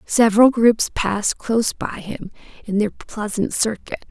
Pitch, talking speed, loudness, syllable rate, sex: 215 Hz, 145 wpm, -19 LUFS, 4.5 syllables/s, female